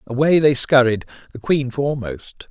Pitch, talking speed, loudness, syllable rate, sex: 130 Hz, 145 wpm, -18 LUFS, 4.7 syllables/s, male